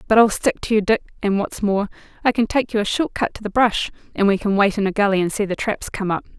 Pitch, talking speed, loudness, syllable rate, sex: 210 Hz, 300 wpm, -20 LUFS, 6.2 syllables/s, female